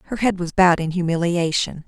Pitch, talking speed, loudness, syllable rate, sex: 175 Hz, 190 wpm, -20 LUFS, 6.1 syllables/s, female